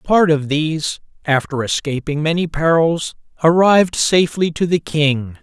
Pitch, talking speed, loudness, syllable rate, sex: 160 Hz, 135 wpm, -16 LUFS, 4.5 syllables/s, male